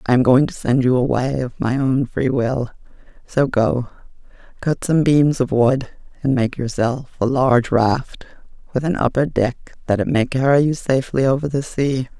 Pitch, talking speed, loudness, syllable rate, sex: 130 Hz, 185 wpm, -18 LUFS, 4.8 syllables/s, female